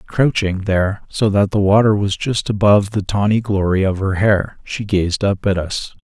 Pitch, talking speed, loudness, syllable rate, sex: 100 Hz, 200 wpm, -17 LUFS, 4.7 syllables/s, male